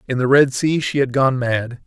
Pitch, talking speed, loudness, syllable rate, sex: 130 Hz, 255 wpm, -17 LUFS, 4.8 syllables/s, male